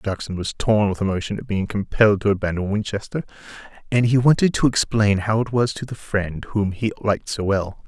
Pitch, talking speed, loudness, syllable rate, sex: 105 Hz, 205 wpm, -21 LUFS, 5.6 syllables/s, male